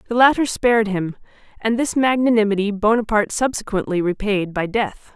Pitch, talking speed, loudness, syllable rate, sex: 215 Hz, 140 wpm, -19 LUFS, 5.5 syllables/s, female